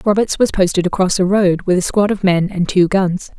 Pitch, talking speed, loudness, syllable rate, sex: 190 Hz, 250 wpm, -15 LUFS, 5.3 syllables/s, female